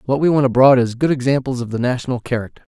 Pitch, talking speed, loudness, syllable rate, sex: 130 Hz, 240 wpm, -17 LUFS, 7.1 syllables/s, male